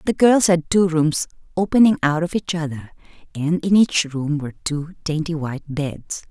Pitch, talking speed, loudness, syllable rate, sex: 165 Hz, 180 wpm, -20 LUFS, 4.8 syllables/s, female